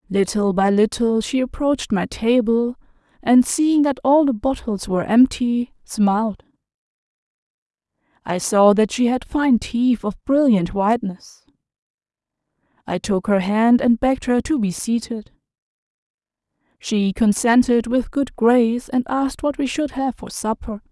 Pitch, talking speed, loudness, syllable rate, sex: 235 Hz, 140 wpm, -19 LUFS, 4.4 syllables/s, female